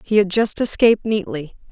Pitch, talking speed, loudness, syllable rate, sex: 200 Hz, 175 wpm, -18 LUFS, 5.4 syllables/s, female